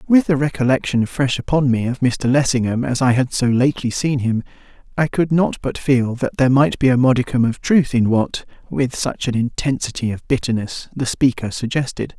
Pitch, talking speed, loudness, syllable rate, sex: 130 Hz, 195 wpm, -18 LUFS, 5.3 syllables/s, male